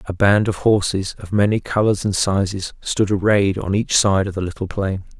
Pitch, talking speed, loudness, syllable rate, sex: 100 Hz, 210 wpm, -19 LUFS, 4.9 syllables/s, male